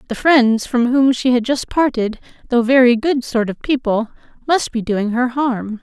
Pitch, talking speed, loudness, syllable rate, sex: 245 Hz, 195 wpm, -16 LUFS, 4.4 syllables/s, female